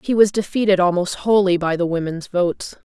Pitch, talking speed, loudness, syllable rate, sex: 185 Hz, 185 wpm, -18 LUFS, 5.5 syllables/s, female